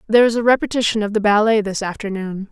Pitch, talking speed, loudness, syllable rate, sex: 215 Hz, 215 wpm, -17 LUFS, 6.8 syllables/s, female